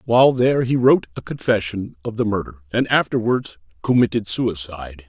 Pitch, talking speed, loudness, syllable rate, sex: 110 Hz, 155 wpm, -19 LUFS, 5.7 syllables/s, male